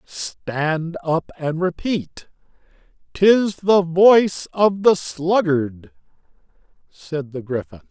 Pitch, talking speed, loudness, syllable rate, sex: 165 Hz, 100 wpm, -19 LUFS, 3.0 syllables/s, male